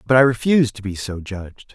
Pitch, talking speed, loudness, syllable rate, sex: 115 Hz, 240 wpm, -19 LUFS, 6.3 syllables/s, male